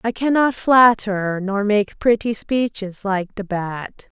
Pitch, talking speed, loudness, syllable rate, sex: 210 Hz, 145 wpm, -19 LUFS, 3.5 syllables/s, female